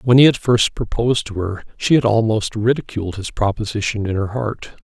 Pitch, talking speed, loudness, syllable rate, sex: 110 Hz, 195 wpm, -18 LUFS, 5.5 syllables/s, male